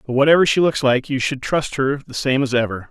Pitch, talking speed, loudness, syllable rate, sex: 135 Hz, 270 wpm, -18 LUFS, 5.8 syllables/s, male